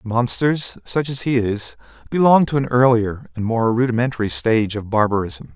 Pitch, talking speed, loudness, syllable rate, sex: 120 Hz, 160 wpm, -19 LUFS, 5.0 syllables/s, male